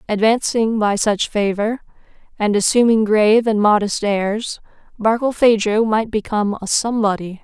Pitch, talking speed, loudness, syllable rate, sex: 215 Hz, 120 wpm, -17 LUFS, 4.7 syllables/s, female